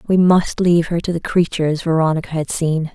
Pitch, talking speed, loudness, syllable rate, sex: 165 Hz, 205 wpm, -17 LUFS, 5.7 syllables/s, female